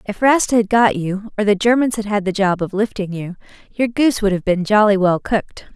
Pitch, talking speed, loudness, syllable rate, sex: 205 Hz, 240 wpm, -17 LUFS, 5.6 syllables/s, female